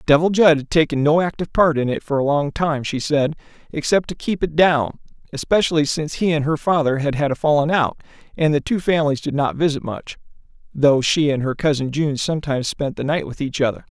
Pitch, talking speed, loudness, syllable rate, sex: 150 Hz, 215 wpm, -19 LUFS, 5.9 syllables/s, male